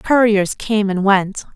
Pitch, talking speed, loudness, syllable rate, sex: 205 Hz, 155 wpm, -16 LUFS, 3.5 syllables/s, female